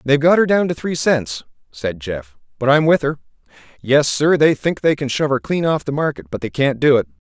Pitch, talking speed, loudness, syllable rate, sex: 140 Hz, 245 wpm, -17 LUFS, 5.6 syllables/s, male